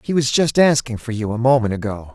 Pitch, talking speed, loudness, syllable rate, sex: 120 Hz, 250 wpm, -18 LUFS, 5.9 syllables/s, male